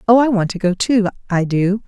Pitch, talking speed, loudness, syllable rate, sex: 200 Hz, 255 wpm, -17 LUFS, 5.4 syllables/s, female